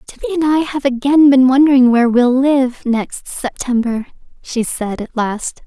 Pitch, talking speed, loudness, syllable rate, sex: 260 Hz, 170 wpm, -15 LUFS, 5.1 syllables/s, female